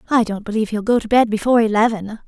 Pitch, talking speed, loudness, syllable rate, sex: 220 Hz, 235 wpm, -17 LUFS, 7.4 syllables/s, female